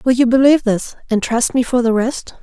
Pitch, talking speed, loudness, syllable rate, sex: 245 Hz, 225 wpm, -15 LUFS, 5.5 syllables/s, female